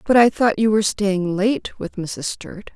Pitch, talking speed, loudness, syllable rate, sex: 205 Hz, 220 wpm, -19 LUFS, 4.2 syllables/s, female